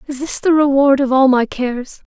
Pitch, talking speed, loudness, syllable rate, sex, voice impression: 270 Hz, 230 wpm, -14 LUFS, 5.2 syllables/s, female, very feminine, young, very thin, very tensed, powerful, slightly soft, very clear, very fluent, cute, intellectual, very refreshing, sincere, calm, friendly, reassuring, unique, slightly elegant, wild, sweet, very lively, strict, intense, slightly sharp, light